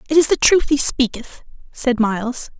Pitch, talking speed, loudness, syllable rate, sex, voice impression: 260 Hz, 185 wpm, -17 LUFS, 5.0 syllables/s, female, feminine, adult-like, slightly clear, fluent, slightly refreshing, friendly